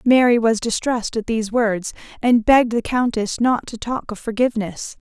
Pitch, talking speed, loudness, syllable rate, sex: 230 Hz, 175 wpm, -19 LUFS, 5.2 syllables/s, female